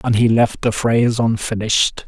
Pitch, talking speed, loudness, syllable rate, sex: 115 Hz, 175 wpm, -17 LUFS, 5.1 syllables/s, male